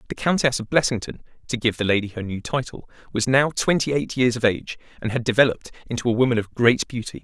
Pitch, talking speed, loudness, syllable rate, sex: 120 Hz, 205 wpm, -22 LUFS, 6.5 syllables/s, male